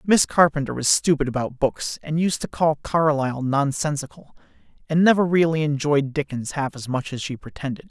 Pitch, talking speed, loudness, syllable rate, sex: 150 Hz, 175 wpm, -22 LUFS, 5.3 syllables/s, male